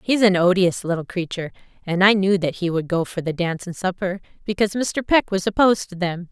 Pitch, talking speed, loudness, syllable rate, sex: 185 Hz, 230 wpm, -20 LUFS, 6.1 syllables/s, female